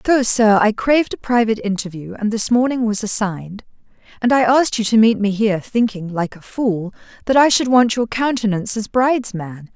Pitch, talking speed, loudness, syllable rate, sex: 220 Hz, 205 wpm, -17 LUFS, 5.6 syllables/s, female